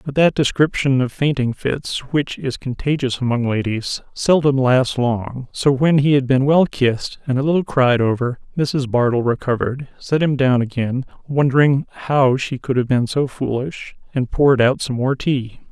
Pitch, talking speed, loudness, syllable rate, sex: 130 Hz, 180 wpm, -18 LUFS, 4.6 syllables/s, male